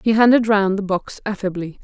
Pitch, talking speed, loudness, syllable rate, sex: 205 Hz, 195 wpm, -18 LUFS, 5.4 syllables/s, female